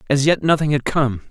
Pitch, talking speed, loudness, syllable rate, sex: 140 Hz, 230 wpm, -18 LUFS, 5.8 syllables/s, male